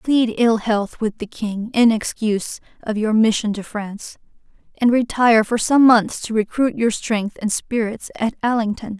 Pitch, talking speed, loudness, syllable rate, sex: 220 Hz, 175 wpm, -19 LUFS, 4.5 syllables/s, female